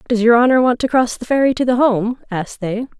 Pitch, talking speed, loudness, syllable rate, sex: 240 Hz, 260 wpm, -16 LUFS, 6.4 syllables/s, female